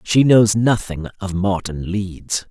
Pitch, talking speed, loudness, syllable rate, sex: 100 Hz, 145 wpm, -18 LUFS, 3.5 syllables/s, male